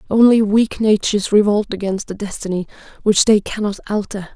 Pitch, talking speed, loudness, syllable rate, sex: 205 Hz, 150 wpm, -17 LUFS, 5.4 syllables/s, female